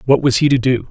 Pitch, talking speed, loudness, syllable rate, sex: 130 Hz, 330 wpm, -14 LUFS, 6.5 syllables/s, male